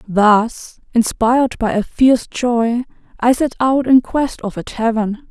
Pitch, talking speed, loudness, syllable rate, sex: 240 Hz, 160 wpm, -16 LUFS, 3.9 syllables/s, female